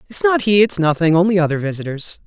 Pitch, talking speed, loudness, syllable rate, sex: 165 Hz, 210 wpm, -16 LUFS, 6.4 syllables/s, male